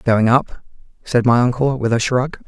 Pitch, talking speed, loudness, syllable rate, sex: 125 Hz, 195 wpm, -17 LUFS, 4.4 syllables/s, male